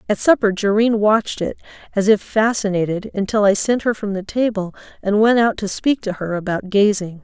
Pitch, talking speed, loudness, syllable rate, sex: 205 Hz, 200 wpm, -18 LUFS, 5.5 syllables/s, female